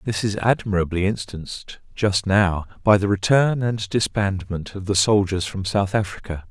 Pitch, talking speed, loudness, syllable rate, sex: 100 Hz, 155 wpm, -21 LUFS, 4.6 syllables/s, male